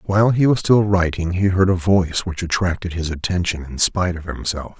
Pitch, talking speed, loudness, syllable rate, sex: 90 Hz, 215 wpm, -19 LUFS, 5.6 syllables/s, male